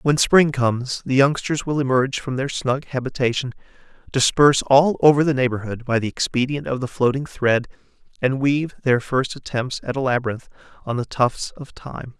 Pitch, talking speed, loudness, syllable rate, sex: 130 Hz, 175 wpm, -20 LUFS, 5.3 syllables/s, male